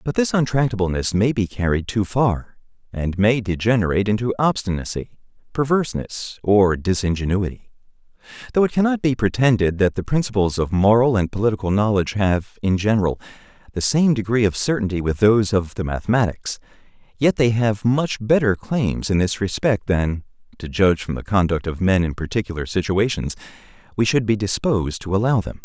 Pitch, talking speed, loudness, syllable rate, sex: 105 Hz, 160 wpm, -20 LUFS, 5.6 syllables/s, male